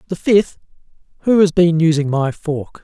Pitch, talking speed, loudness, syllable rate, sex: 165 Hz, 170 wpm, -16 LUFS, 4.6 syllables/s, male